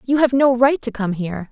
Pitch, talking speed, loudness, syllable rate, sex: 240 Hz, 275 wpm, -17 LUFS, 5.8 syllables/s, female